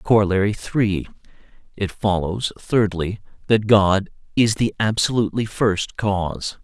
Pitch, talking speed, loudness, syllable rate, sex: 105 Hz, 100 wpm, -20 LUFS, 4.3 syllables/s, male